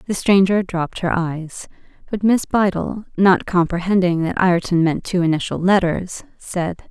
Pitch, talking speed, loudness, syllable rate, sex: 180 Hz, 150 wpm, -18 LUFS, 4.5 syllables/s, female